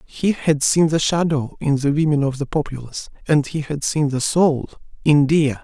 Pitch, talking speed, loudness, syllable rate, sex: 145 Hz, 200 wpm, -19 LUFS, 4.9 syllables/s, male